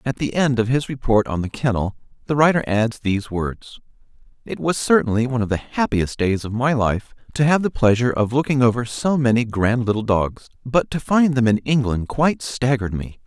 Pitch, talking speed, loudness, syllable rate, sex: 120 Hz, 210 wpm, -20 LUFS, 5.4 syllables/s, male